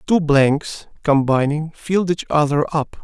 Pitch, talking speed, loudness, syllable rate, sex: 150 Hz, 140 wpm, -18 LUFS, 4.3 syllables/s, male